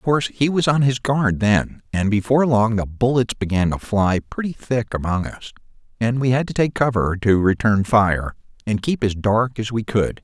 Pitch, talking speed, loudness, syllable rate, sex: 115 Hz, 210 wpm, -19 LUFS, 4.9 syllables/s, male